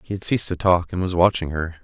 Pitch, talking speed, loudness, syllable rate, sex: 90 Hz, 295 wpm, -21 LUFS, 6.6 syllables/s, male